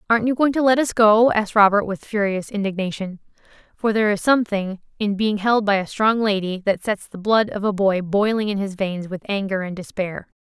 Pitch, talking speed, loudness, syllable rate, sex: 205 Hz, 220 wpm, -20 LUFS, 5.5 syllables/s, female